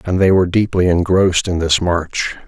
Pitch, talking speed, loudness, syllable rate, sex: 90 Hz, 195 wpm, -15 LUFS, 5.2 syllables/s, male